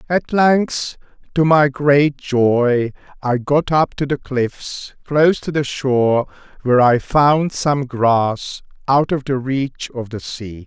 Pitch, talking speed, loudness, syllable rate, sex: 135 Hz, 155 wpm, -17 LUFS, 3.4 syllables/s, male